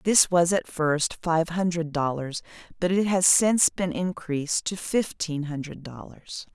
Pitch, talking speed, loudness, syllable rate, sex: 165 Hz, 155 wpm, -24 LUFS, 4.2 syllables/s, female